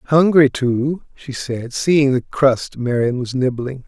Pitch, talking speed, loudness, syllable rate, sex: 135 Hz, 155 wpm, -17 LUFS, 3.5 syllables/s, male